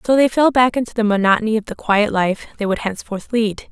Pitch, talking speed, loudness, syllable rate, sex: 220 Hz, 240 wpm, -17 LUFS, 6.1 syllables/s, female